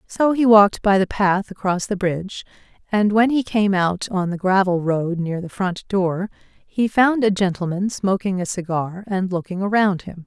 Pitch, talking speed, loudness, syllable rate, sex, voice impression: 195 Hz, 195 wpm, -20 LUFS, 4.6 syllables/s, female, feminine, middle-aged, tensed, slightly weak, soft, clear, intellectual, slightly friendly, reassuring, elegant, lively, kind, slightly sharp